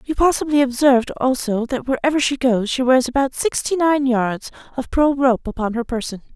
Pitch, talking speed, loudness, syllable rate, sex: 260 Hz, 190 wpm, -18 LUFS, 5.3 syllables/s, female